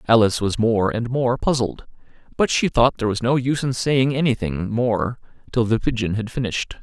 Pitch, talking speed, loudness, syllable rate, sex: 120 Hz, 195 wpm, -21 LUFS, 5.5 syllables/s, male